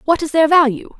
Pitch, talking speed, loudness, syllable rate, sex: 305 Hz, 240 wpm, -14 LUFS, 5.8 syllables/s, female